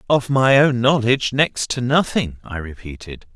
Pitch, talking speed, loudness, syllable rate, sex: 120 Hz, 160 wpm, -17 LUFS, 4.6 syllables/s, male